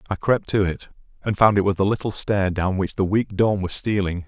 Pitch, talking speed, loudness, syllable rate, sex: 100 Hz, 255 wpm, -21 LUFS, 5.3 syllables/s, male